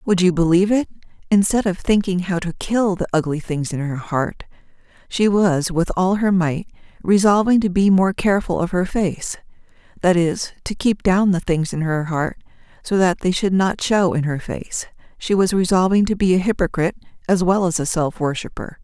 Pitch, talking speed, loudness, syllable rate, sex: 180 Hz, 195 wpm, -19 LUFS, 5.1 syllables/s, female